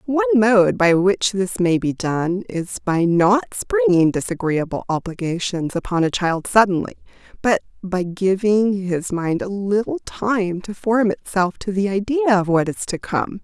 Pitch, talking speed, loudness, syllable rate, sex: 195 Hz, 165 wpm, -19 LUFS, 4.3 syllables/s, female